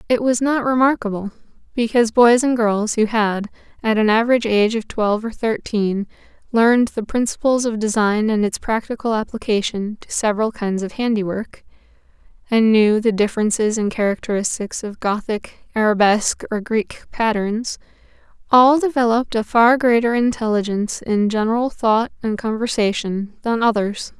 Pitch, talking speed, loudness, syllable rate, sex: 220 Hz, 140 wpm, -18 LUFS, 5.2 syllables/s, female